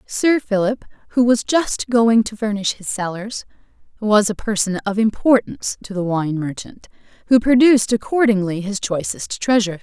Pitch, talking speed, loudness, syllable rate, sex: 215 Hz, 155 wpm, -18 LUFS, 4.9 syllables/s, female